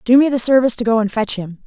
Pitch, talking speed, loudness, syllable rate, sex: 230 Hz, 325 wpm, -16 LUFS, 7.1 syllables/s, female